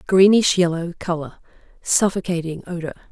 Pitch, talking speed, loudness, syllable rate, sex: 175 Hz, 95 wpm, -19 LUFS, 5.3 syllables/s, female